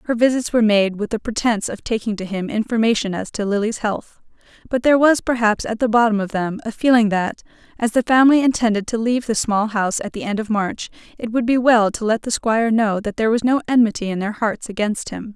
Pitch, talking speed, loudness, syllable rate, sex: 220 Hz, 240 wpm, -19 LUFS, 6.1 syllables/s, female